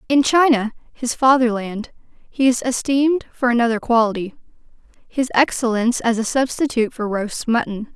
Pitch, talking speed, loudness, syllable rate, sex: 240 Hz, 130 wpm, -19 LUFS, 5.1 syllables/s, female